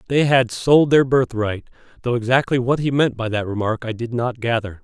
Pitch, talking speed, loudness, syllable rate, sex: 120 Hz, 210 wpm, -19 LUFS, 5.2 syllables/s, male